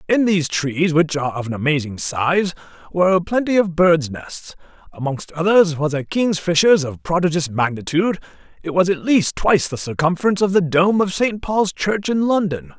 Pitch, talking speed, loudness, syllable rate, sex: 170 Hz, 185 wpm, -18 LUFS, 5.2 syllables/s, male